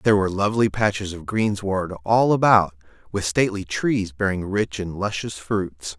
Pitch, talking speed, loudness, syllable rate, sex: 100 Hz, 160 wpm, -22 LUFS, 4.9 syllables/s, male